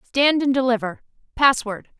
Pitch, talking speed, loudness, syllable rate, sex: 250 Hz, 120 wpm, -19 LUFS, 4.7 syllables/s, female